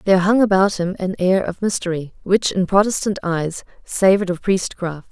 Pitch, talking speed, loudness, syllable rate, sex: 190 Hz, 175 wpm, -18 LUFS, 5.0 syllables/s, female